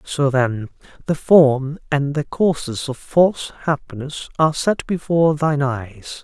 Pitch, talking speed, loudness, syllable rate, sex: 145 Hz, 145 wpm, -19 LUFS, 4.3 syllables/s, male